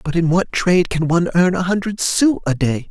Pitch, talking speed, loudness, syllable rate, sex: 175 Hz, 250 wpm, -17 LUFS, 5.6 syllables/s, male